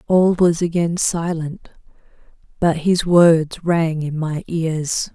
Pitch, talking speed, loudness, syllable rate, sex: 165 Hz, 130 wpm, -18 LUFS, 3.2 syllables/s, female